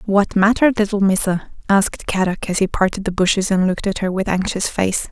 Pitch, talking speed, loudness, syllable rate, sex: 195 Hz, 210 wpm, -18 LUFS, 5.8 syllables/s, female